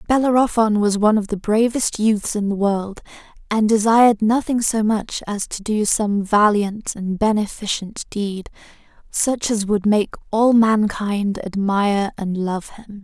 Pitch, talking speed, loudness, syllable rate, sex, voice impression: 210 Hz, 150 wpm, -19 LUFS, 4.2 syllables/s, female, very feminine, young, very thin, slightly tensed, weak, bright, soft, clear, slightly muffled, fluent, very cute, intellectual, refreshing, slightly sincere, very calm, very friendly, very reassuring, very unique, elegant, very sweet, slightly lively, very kind, modest